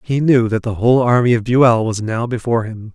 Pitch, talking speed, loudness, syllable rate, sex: 115 Hz, 245 wpm, -15 LUFS, 5.6 syllables/s, male